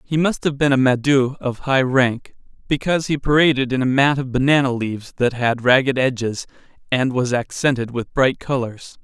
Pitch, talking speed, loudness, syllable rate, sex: 130 Hz, 185 wpm, -19 LUFS, 5.1 syllables/s, male